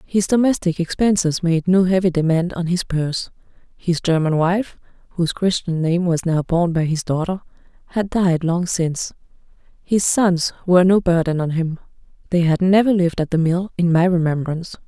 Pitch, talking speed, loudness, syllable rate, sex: 175 Hz, 175 wpm, -19 LUFS, 4.4 syllables/s, female